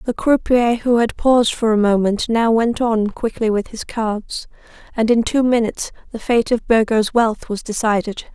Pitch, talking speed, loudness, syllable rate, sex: 225 Hz, 185 wpm, -17 LUFS, 4.7 syllables/s, female